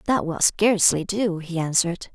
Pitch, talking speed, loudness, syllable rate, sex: 185 Hz, 170 wpm, -21 LUFS, 5.0 syllables/s, female